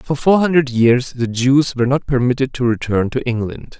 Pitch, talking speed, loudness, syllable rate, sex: 130 Hz, 205 wpm, -16 LUFS, 5.1 syllables/s, male